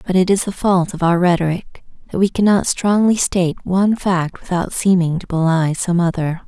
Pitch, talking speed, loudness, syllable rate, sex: 180 Hz, 195 wpm, -17 LUFS, 5.2 syllables/s, female